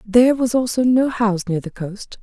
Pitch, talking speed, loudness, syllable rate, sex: 225 Hz, 215 wpm, -18 LUFS, 5.3 syllables/s, female